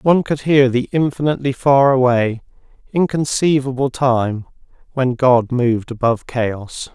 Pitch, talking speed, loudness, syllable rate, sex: 130 Hz, 110 wpm, -17 LUFS, 4.6 syllables/s, male